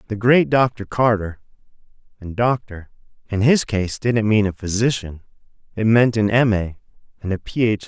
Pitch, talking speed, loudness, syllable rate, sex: 110 Hz, 160 wpm, -19 LUFS, 4.5 syllables/s, male